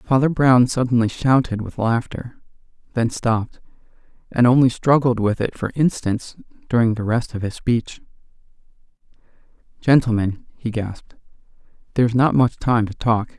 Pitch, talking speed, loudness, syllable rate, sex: 120 Hz, 135 wpm, -19 LUFS, 4.8 syllables/s, male